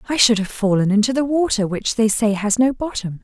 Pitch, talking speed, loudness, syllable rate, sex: 225 Hz, 240 wpm, -18 LUFS, 5.6 syllables/s, female